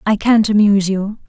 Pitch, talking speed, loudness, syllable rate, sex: 205 Hz, 190 wpm, -14 LUFS, 5.5 syllables/s, female